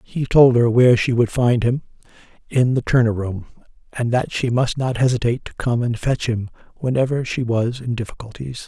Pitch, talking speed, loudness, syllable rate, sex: 120 Hz, 195 wpm, -19 LUFS, 5.3 syllables/s, male